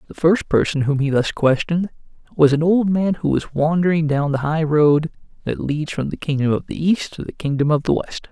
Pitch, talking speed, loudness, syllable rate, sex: 155 Hz, 230 wpm, -19 LUFS, 5.3 syllables/s, male